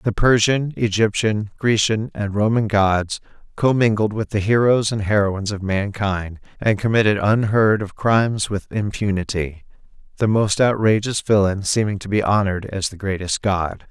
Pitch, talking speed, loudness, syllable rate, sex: 105 Hz, 145 wpm, -19 LUFS, 4.7 syllables/s, male